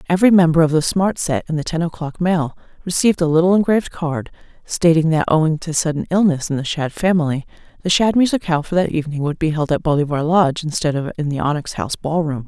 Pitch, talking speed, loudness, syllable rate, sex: 160 Hz, 215 wpm, -18 LUFS, 6.5 syllables/s, female